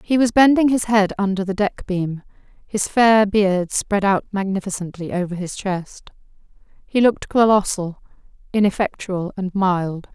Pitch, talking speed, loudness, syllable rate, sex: 200 Hz, 140 wpm, -19 LUFS, 4.5 syllables/s, female